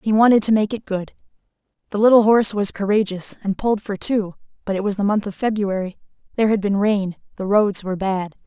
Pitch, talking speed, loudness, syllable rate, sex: 205 Hz, 215 wpm, -19 LUFS, 6.1 syllables/s, female